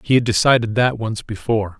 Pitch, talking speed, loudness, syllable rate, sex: 110 Hz, 200 wpm, -18 LUFS, 5.9 syllables/s, male